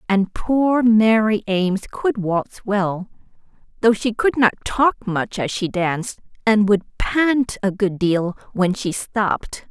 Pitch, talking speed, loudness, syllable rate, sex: 210 Hz, 155 wpm, -19 LUFS, 3.7 syllables/s, female